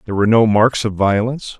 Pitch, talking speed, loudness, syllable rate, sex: 110 Hz, 225 wpm, -15 LUFS, 6.9 syllables/s, male